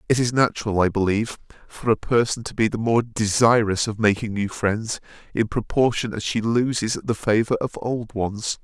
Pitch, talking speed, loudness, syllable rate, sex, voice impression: 110 Hz, 190 wpm, -22 LUFS, 5.0 syllables/s, male, masculine, adult-like, slightly thin, relaxed, weak, slightly soft, fluent, slightly raspy, cool, calm, slightly mature, unique, wild, slightly lively, kind